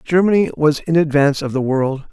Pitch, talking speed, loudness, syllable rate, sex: 150 Hz, 200 wpm, -16 LUFS, 5.8 syllables/s, male